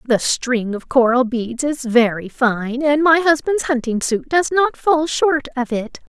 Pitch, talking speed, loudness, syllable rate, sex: 265 Hz, 185 wpm, -17 LUFS, 3.9 syllables/s, female